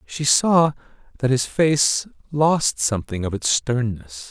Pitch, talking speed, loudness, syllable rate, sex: 130 Hz, 140 wpm, -20 LUFS, 3.7 syllables/s, male